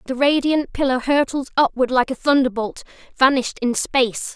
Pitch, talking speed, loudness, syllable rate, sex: 260 Hz, 165 wpm, -19 LUFS, 5.3 syllables/s, female